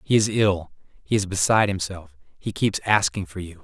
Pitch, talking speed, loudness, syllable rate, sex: 95 Hz, 200 wpm, -22 LUFS, 5.0 syllables/s, male